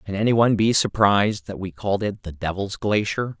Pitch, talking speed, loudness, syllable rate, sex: 100 Hz, 195 wpm, -22 LUFS, 5.5 syllables/s, male